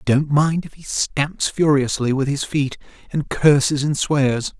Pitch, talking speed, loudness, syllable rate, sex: 140 Hz, 170 wpm, -19 LUFS, 3.9 syllables/s, male